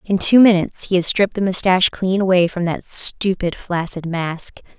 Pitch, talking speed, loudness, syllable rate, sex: 185 Hz, 190 wpm, -17 LUFS, 5.1 syllables/s, female